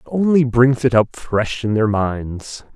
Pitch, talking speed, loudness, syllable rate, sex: 120 Hz, 195 wpm, -17 LUFS, 3.9 syllables/s, male